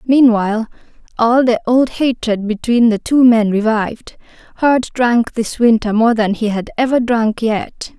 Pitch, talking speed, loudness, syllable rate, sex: 230 Hz, 160 wpm, -14 LUFS, 4.3 syllables/s, female